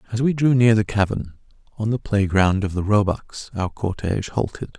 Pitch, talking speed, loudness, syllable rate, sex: 105 Hz, 190 wpm, -21 LUFS, 5.1 syllables/s, male